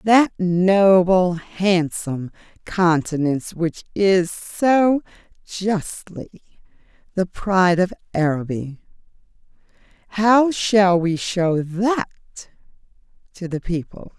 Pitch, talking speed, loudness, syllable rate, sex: 185 Hz, 80 wpm, -19 LUFS, 3.4 syllables/s, female